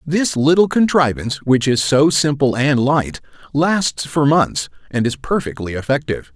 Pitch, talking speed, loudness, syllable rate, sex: 140 Hz, 150 wpm, -17 LUFS, 4.6 syllables/s, male